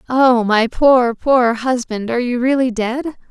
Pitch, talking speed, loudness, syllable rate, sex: 245 Hz, 165 wpm, -15 LUFS, 4.1 syllables/s, female